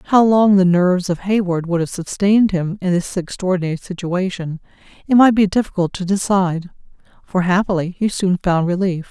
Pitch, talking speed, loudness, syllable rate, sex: 185 Hz, 170 wpm, -17 LUFS, 5.4 syllables/s, female